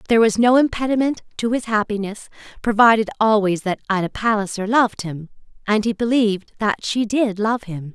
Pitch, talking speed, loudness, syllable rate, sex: 215 Hz, 165 wpm, -19 LUFS, 5.6 syllables/s, female